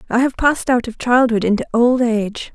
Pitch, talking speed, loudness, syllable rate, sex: 240 Hz, 210 wpm, -17 LUFS, 5.8 syllables/s, female